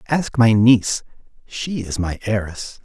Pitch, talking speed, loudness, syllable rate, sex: 110 Hz, 125 wpm, -19 LUFS, 4.1 syllables/s, male